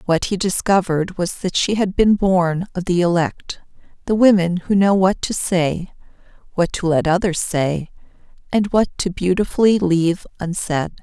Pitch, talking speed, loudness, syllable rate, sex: 180 Hz, 160 wpm, -18 LUFS, 4.6 syllables/s, female